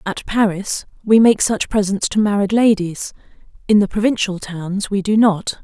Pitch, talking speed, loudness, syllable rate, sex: 200 Hz, 170 wpm, -17 LUFS, 4.6 syllables/s, female